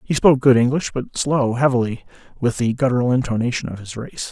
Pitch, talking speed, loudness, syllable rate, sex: 125 Hz, 195 wpm, -19 LUFS, 6.2 syllables/s, male